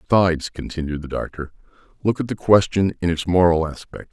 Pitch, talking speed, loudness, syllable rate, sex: 90 Hz, 175 wpm, -20 LUFS, 5.9 syllables/s, male